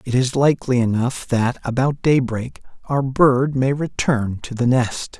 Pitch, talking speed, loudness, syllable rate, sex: 125 Hz, 160 wpm, -19 LUFS, 4.2 syllables/s, male